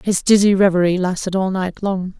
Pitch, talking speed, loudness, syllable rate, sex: 190 Hz, 190 wpm, -17 LUFS, 5.3 syllables/s, female